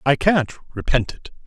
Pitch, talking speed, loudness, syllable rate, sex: 145 Hz, 165 wpm, -20 LUFS, 4.0 syllables/s, male